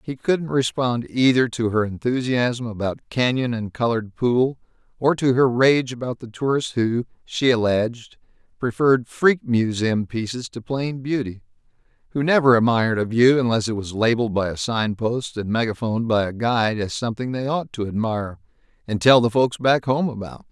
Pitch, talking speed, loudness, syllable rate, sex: 120 Hz, 165 wpm, -21 LUFS, 5.1 syllables/s, male